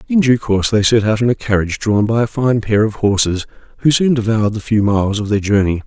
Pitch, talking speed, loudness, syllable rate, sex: 110 Hz, 255 wpm, -15 LUFS, 6.2 syllables/s, male